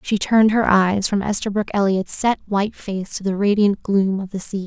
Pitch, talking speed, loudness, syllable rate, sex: 200 Hz, 220 wpm, -19 LUFS, 5.2 syllables/s, female